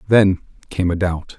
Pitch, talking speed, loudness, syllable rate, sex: 90 Hz, 175 wpm, -19 LUFS, 3.4 syllables/s, male